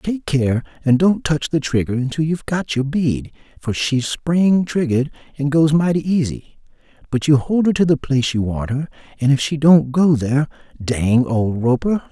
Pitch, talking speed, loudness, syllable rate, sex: 145 Hz, 195 wpm, -18 LUFS, 4.7 syllables/s, male